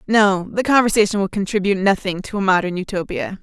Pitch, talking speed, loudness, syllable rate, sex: 200 Hz, 175 wpm, -18 LUFS, 6.2 syllables/s, female